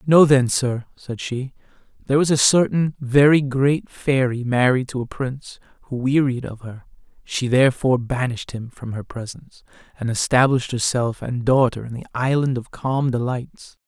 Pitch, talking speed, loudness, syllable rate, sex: 130 Hz, 165 wpm, -20 LUFS, 4.9 syllables/s, male